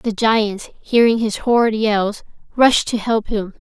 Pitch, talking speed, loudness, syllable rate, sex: 220 Hz, 165 wpm, -17 LUFS, 3.9 syllables/s, female